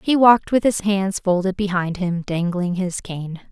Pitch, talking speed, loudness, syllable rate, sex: 190 Hz, 190 wpm, -20 LUFS, 4.4 syllables/s, female